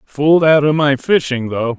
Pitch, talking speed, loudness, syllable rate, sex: 145 Hz, 200 wpm, -14 LUFS, 4.8 syllables/s, male